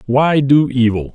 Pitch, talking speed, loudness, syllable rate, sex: 130 Hz, 155 wpm, -14 LUFS, 4.0 syllables/s, male